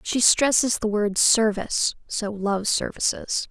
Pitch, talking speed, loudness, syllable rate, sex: 215 Hz, 135 wpm, -22 LUFS, 4.1 syllables/s, female